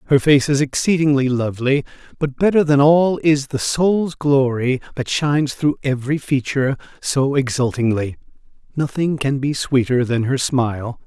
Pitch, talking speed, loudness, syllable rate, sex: 135 Hz, 145 wpm, -18 LUFS, 4.8 syllables/s, male